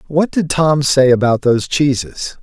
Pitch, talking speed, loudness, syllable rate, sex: 140 Hz, 175 wpm, -14 LUFS, 4.5 syllables/s, male